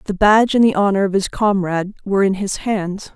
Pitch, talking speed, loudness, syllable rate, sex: 200 Hz, 230 wpm, -17 LUFS, 5.9 syllables/s, female